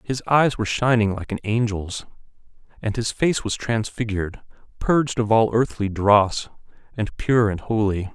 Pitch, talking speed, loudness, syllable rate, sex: 110 Hz, 155 wpm, -22 LUFS, 4.7 syllables/s, male